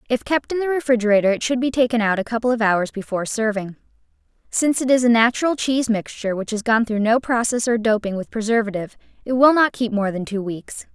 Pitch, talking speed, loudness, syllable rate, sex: 230 Hz, 225 wpm, -20 LUFS, 6.4 syllables/s, female